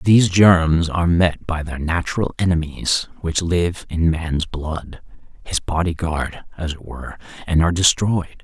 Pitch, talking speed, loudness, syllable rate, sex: 85 Hz, 140 wpm, -19 LUFS, 4.3 syllables/s, male